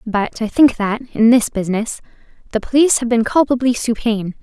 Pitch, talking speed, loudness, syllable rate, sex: 230 Hz, 175 wpm, -16 LUFS, 5.8 syllables/s, female